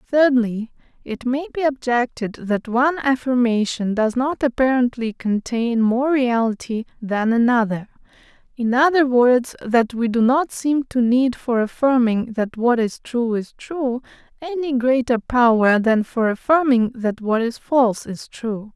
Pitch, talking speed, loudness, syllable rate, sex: 245 Hz, 145 wpm, -19 LUFS, 4.2 syllables/s, female